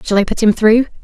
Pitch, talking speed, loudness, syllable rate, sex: 220 Hz, 290 wpm, -13 LUFS, 6.3 syllables/s, female